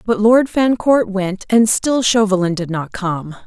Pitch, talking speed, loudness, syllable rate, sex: 210 Hz, 175 wpm, -16 LUFS, 4.0 syllables/s, female